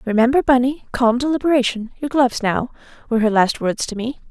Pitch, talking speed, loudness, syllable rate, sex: 245 Hz, 155 wpm, -18 LUFS, 6.1 syllables/s, female